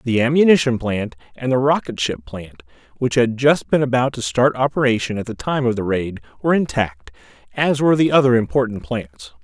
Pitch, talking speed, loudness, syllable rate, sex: 125 Hz, 190 wpm, -18 LUFS, 5.6 syllables/s, male